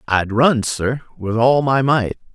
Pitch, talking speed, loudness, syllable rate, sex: 120 Hz, 180 wpm, -17 LUFS, 3.7 syllables/s, male